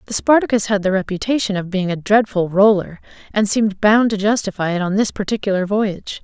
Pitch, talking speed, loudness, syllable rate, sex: 205 Hz, 190 wpm, -17 LUFS, 5.9 syllables/s, female